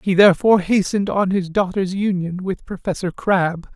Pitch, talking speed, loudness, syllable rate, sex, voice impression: 190 Hz, 160 wpm, -19 LUFS, 5.2 syllables/s, male, slightly masculine, feminine, very gender-neutral, very adult-like, slightly middle-aged, slightly thin, tensed, powerful, bright, slightly hard, fluent, slightly raspy, cool, intellectual, very refreshing, sincere, calm, slightly friendly, slightly reassuring, very unique, slightly elegant, slightly wild, slightly sweet, lively, strict, slightly intense, sharp, slightly light